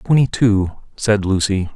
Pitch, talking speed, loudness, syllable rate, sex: 105 Hz, 135 wpm, -17 LUFS, 4.3 syllables/s, male